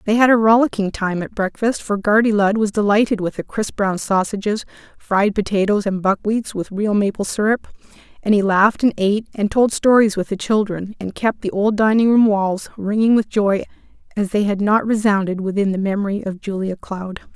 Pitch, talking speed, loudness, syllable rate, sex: 205 Hz, 195 wpm, -18 LUFS, 5.3 syllables/s, female